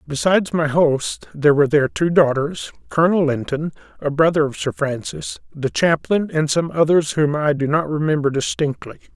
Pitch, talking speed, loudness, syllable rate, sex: 155 Hz, 170 wpm, -19 LUFS, 5.1 syllables/s, male